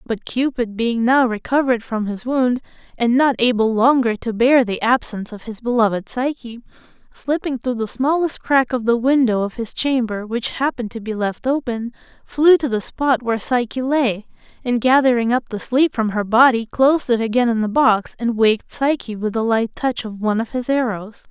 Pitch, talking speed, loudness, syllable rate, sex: 240 Hz, 195 wpm, -19 LUFS, 5.1 syllables/s, female